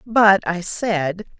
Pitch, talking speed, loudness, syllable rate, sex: 190 Hz, 130 wpm, -18 LUFS, 2.6 syllables/s, female